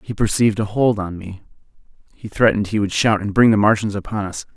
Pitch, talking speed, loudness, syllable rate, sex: 105 Hz, 210 wpm, -18 LUFS, 6.3 syllables/s, male